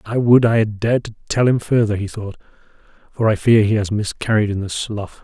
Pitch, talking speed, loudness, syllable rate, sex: 110 Hz, 230 wpm, -18 LUFS, 5.7 syllables/s, male